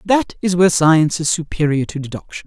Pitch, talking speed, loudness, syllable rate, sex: 165 Hz, 195 wpm, -16 LUFS, 5.9 syllables/s, female